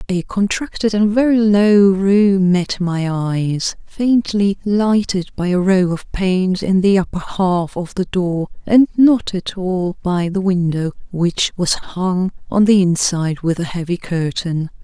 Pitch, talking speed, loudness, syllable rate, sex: 190 Hz, 160 wpm, -17 LUFS, 3.9 syllables/s, female